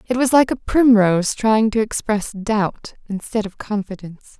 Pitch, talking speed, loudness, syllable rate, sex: 215 Hz, 165 wpm, -18 LUFS, 4.7 syllables/s, female